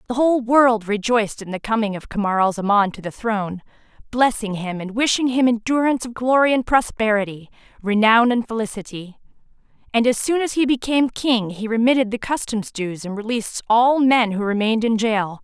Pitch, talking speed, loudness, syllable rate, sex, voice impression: 225 Hz, 185 wpm, -19 LUFS, 5.6 syllables/s, female, very feminine, slightly young, slightly adult-like, very thin, tensed, slightly powerful, bright, slightly hard, clear, slightly muffled, slightly raspy, very cute, intellectual, very refreshing, sincere, calm, friendly, reassuring, very unique, elegant, wild, very sweet, kind, slightly intense, modest